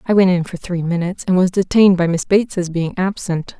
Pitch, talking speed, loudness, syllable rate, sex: 180 Hz, 235 wpm, -17 LUFS, 5.7 syllables/s, female